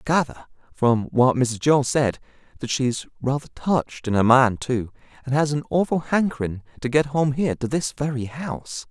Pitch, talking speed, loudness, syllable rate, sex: 130 Hz, 180 wpm, -22 LUFS, 5.1 syllables/s, male